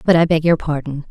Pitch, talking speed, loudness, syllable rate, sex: 155 Hz, 270 wpm, -17 LUFS, 6.1 syllables/s, female